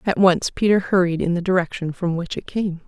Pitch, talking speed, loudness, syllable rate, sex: 180 Hz, 230 wpm, -20 LUFS, 5.5 syllables/s, female